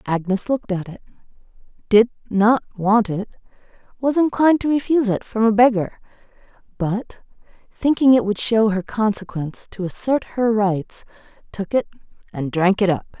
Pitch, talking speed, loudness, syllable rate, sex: 215 Hz, 150 wpm, -19 LUFS, 5.0 syllables/s, female